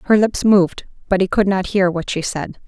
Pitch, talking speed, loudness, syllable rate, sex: 190 Hz, 245 wpm, -17 LUFS, 5.4 syllables/s, female